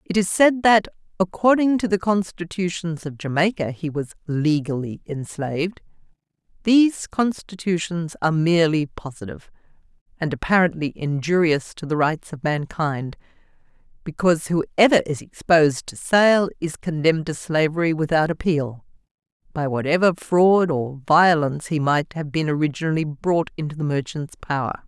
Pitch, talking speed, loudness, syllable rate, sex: 165 Hz, 130 wpm, -21 LUFS, 4.9 syllables/s, female